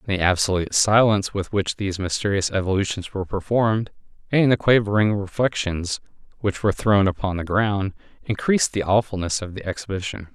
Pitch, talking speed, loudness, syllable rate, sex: 100 Hz, 150 wpm, -22 LUFS, 5.8 syllables/s, male